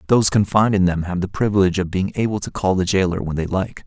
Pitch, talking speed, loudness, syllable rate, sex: 95 Hz, 265 wpm, -19 LUFS, 6.9 syllables/s, male